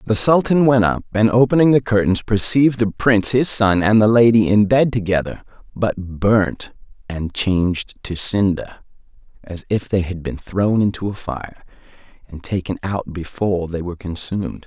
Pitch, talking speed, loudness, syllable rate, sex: 105 Hz, 170 wpm, -17 LUFS, 5.0 syllables/s, male